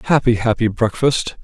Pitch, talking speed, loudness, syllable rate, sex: 115 Hz, 125 wpm, -17 LUFS, 4.6 syllables/s, male